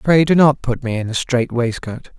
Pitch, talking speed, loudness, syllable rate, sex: 130 Hz, 245 wpm, -17 LUFS, 4.9 syllables/s, male